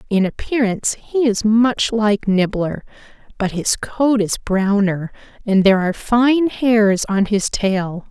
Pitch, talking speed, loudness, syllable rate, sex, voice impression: 215 Hz, 150 wpm, -17 LUFS, 3.9 syllables/s, female, very feminine, slightly adult-like, very thin, relaxed, weak, slightly dark, soft, clear, fluent, very cute, slightly cool, intellectual, very refreshing, sincere, calm, very friendly, very reassuring, very unique, elegant, slightly wild, very sweet, very kind, slightly strict, slightly intense, slightly modest, slightly light